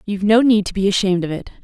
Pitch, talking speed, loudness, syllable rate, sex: 200 Hz, 295 wpm, -17 LUFS, 7.9 syllables/s, female